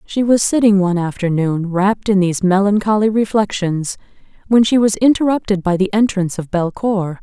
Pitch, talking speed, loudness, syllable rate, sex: 200 Hz, 160 wpm, -15 LUFS, 5.5 syllables/s, female